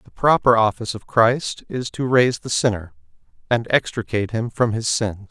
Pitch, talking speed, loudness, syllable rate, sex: 115 Hz, 180 wpm, -20 LUFS, 5.1 syllables/s, male